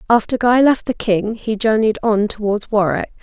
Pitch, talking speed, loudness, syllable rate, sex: 220 Hz, 185 wpm, -17 LUFS, 4.8 syllables/s, female